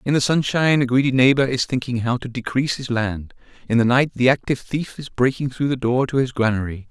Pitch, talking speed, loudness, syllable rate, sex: 125 Hz, 235 wpm, -20 LUFS, 6.1 syllables/s, male